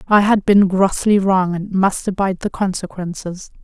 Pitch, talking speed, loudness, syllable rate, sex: 190 Hz, 165 wpm, -17 LUFS, 4.7 syllables/s, female